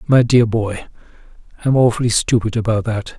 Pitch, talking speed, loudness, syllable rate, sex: 115 Hz, 150 wpm, -16 LUFS, 5.3 syllables/s, male